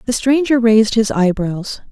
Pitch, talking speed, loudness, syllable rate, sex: 225 Hz, 155 wpm, -15 LUFS, 4.7 syllables/s, female